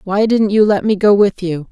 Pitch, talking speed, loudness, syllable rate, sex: 200 Hz, 280 wpm, -13 LUFS, 5.0 syllables/s, female